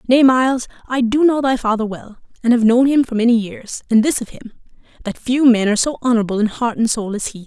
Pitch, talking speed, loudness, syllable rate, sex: 235 Hz, 250 wpm, -16 LUFS, 6.2 syllables/s, female